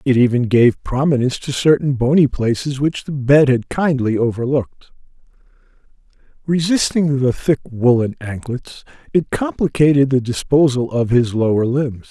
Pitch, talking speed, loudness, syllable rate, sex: 135 Hz, 135 wpm, -17 LUFS, 4.8 syllables/s, male